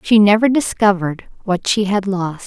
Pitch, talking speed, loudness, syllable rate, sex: 200 Hz, 170 wpm, -16 LUFS, 5.0 syllables/s, female